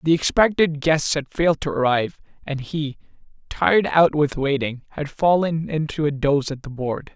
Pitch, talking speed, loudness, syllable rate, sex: 145 Hz, 175 wpm, -21 LUFS, 5.0 syllables/s, male